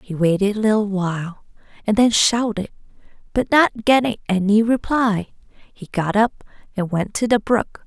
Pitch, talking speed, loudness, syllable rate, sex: 210 Hz, 160 wpm, -19 LUFS, 4.6 syllables/s, female